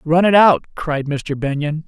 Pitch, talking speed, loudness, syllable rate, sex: 155 Hz, 190 wpm, -16 LUFS, 4.2 syllables/s, male